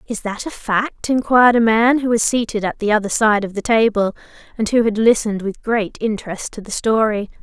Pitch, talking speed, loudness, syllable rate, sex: 220 Hz, 220 wpm, -17 LUFS, 5.5 syllables/s, female